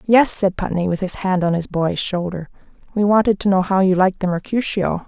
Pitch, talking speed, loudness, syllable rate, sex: 190 Hz, 225 wpm, -18 LUFS, 5.5 syllables/s, female